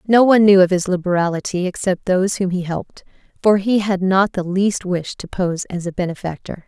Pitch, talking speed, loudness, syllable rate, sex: 185 Hz, 205 wpm, -18 LUFS, 5.6 syllables/s, female